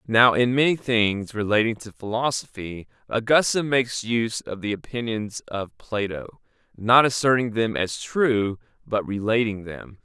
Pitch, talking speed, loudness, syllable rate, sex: 115 Hz, 135 wpm, -23 LUFS, 4.5 syllables/s, male